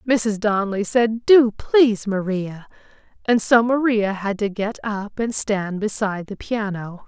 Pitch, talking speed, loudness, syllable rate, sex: 215 Hz, 155 wpm, -20 LUFS, 4.2 syllables/s, female